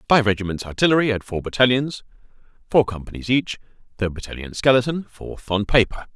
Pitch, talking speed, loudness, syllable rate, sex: 115 Hz, 145 wpm, -21 LUFS, 5.9 syllables/s, male